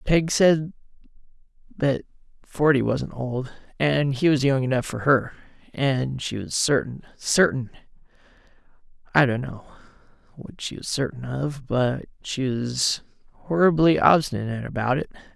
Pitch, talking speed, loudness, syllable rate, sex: 135 Hz, 125 wpm, -23 LUFS, 4.3 syllables/s, male